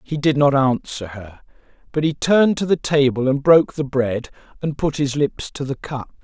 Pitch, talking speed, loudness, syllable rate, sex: 140 Hz, 210 wpm, -19 LUFS, 5.0 syllables/s, male